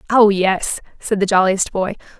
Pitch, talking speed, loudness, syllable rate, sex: 195 Hz, 165 wpm, -17 LUFS, 4.4 syllables/s, female